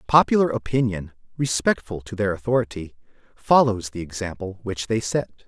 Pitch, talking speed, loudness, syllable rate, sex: 110 Hz, 130 wpm, -23 LUFS, 5.2 syllables/s, male